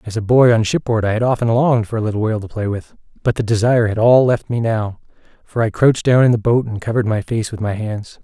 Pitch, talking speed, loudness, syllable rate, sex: 115 Hz, 275 wpm, -17 LUFS, 6.5 syllables/s, male